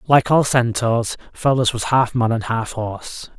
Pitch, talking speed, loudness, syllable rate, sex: 120 Hz, 175 wpm, -19 LUFS, 4.3 syllables/s, male